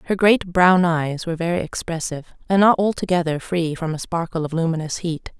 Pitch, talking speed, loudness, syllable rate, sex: 170 Hz, 190 wpm, -20 LUFS, 5.6 syllables/s, female